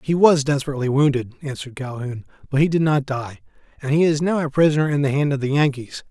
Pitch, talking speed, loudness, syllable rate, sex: 145 Hz, 225 wpm, -20 LUFS, 6.6 syllables/s, male